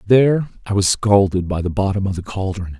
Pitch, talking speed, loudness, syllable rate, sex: 100 Hz, 215 wpm, -18 LUFS, 5.5 syllables/s, male